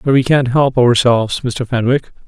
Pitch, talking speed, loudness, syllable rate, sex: 125 Hz, 185 wpm, -14 LUFS, 4.9 syllables/s, male